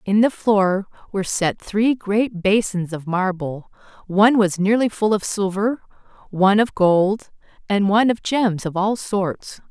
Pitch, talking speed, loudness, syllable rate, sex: 200 Hz, 160 wpm, -19 LUFS, 4.2 syllables/s, female